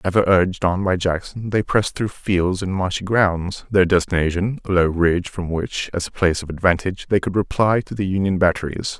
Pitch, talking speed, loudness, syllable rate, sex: 95 Hz, 205 wpm, -20 LUFS, 5.5 syllables/s, male